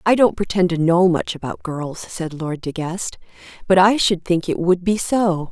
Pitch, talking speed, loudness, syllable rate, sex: 180 Hz, 220 wpm, -19 LUFS, 4.5 syllables/s, female